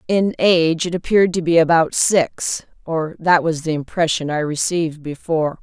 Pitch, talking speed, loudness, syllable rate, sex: 165 Hz, 160 wpm, -18 LUFS, 5.0 syllables/s, female